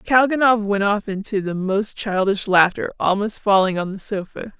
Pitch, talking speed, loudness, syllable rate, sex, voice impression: 205 Hz, 170 wpm, -19 LUFS, 4.8 syllables/s, female, very feminine, middle-aged, slightly muffled, slightly calm, elegant